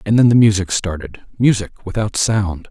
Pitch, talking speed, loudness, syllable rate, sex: 105 Hz, 155 wpm, -16 LUFS, 4.8 syllables/s, male